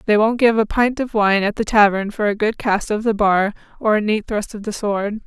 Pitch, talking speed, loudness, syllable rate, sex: 215 Hz, 275 wpm, -18 LUFS, 5.2 syllables/s, female